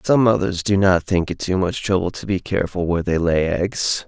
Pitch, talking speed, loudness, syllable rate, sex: 95 Hz, 235 wpm, -19 LUFS, 5.3 syllables/s, male